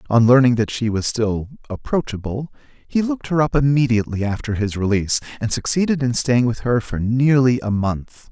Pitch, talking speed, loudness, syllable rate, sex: 120 Hz, 180 wpm, -19 LUFS, 5.4 syllables/s, male